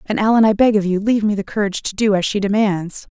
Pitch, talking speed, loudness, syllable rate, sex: 205 Hz, 285 wpm, -17 LUFS, 6.6 syllables/s, female